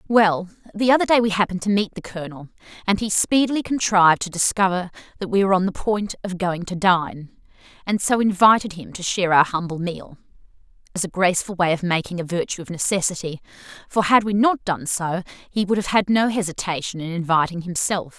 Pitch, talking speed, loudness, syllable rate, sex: 190 Hz, 200 wpm, -21 LUFS, 6.0 syllables/s, female